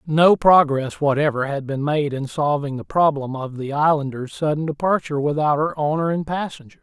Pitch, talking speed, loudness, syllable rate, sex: 145 Hz, 175 wpm, -20 LUFS, 5.2 syllables/s, male